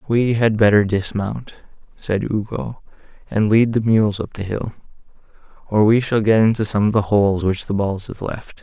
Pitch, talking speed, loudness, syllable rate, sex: 105 Hz, 190 wpm, -18 LUFS, 4.8 syllables/s, male